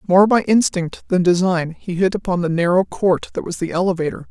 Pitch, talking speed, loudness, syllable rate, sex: 180 Hz, 210 wpm, -18 LUFS, 5.4 syllables/s, female